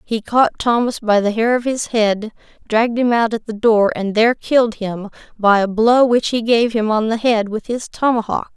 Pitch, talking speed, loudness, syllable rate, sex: 225 Hz, 225 wpm, -16 LUFS, 5.0 syllables/s, female